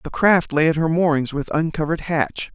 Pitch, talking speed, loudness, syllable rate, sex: 160 Hz, 210 wpm, -20 LUFS, 5.4 syllables/s, male